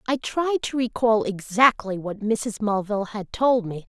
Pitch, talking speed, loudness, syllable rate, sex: 220 Hz, 165 wpm, -23 LUFS, 4.5 syllables/s, female